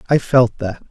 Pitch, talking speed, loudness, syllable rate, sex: 120 Hz, 200 wpm, -15 LUFS, 5.0 syllables/s, male